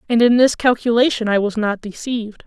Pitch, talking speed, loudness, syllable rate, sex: 225 Hz, 195 wpm, -17 LUFS, 5.7 syllables/s, female